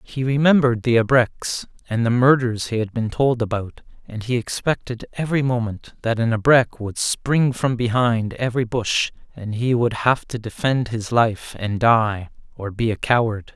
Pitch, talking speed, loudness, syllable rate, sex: 120 Hz, 175 wpm, -20 LUFS, 4.6 syllables/s, male